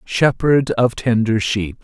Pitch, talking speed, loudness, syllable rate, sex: 115 Hz, 130 wpm, -17 LUFS, 3.5 syllables/s, male